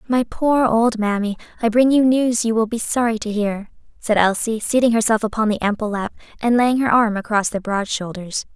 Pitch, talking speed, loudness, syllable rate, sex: 225 Hz, 210 wpm, -19 LUFS, 5.2 syllables/s, female